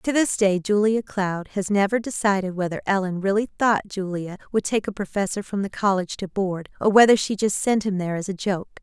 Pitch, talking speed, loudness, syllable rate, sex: 200 Hz, 220 wpm, -22 LUFS, 5.6 syllables/s, female